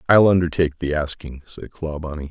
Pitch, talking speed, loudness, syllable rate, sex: 80 Hz, 155 wpm, -20 LUFS, 6.3 syllables/s, male